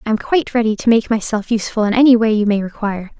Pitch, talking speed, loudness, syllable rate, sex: 220 Hz, 245 wpm, -16 LUFS, 7.0 syllables/s, female